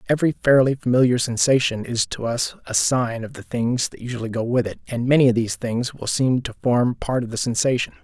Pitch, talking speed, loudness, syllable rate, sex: 120 Hz, 225 wpm, -21 LUFS, 5.7 syllables/s, male